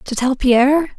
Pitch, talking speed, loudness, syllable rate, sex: 265 Hz, 185 wpm, -15 LUFS, 5.0 syllables/s, female